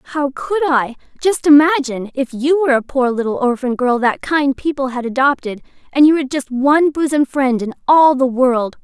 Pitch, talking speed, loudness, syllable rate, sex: 270 Hz, 195 wpm, -15 LUFS, 5.2 syllables/s, female